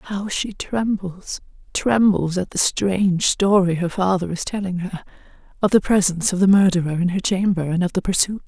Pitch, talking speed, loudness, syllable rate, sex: 185 Hz, 175 wpm, -20 LUFS, 5.1 syllables/s, female